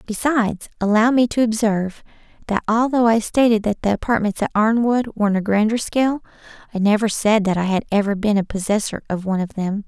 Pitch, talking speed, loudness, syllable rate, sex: 215 Hz, 200 wpm, -19 LUFS, 6.0 syllables/s, female